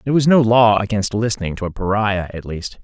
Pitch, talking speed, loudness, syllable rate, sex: 105 Hz, 235 wpm, -17 LUFS, 5.9 syllables/s, male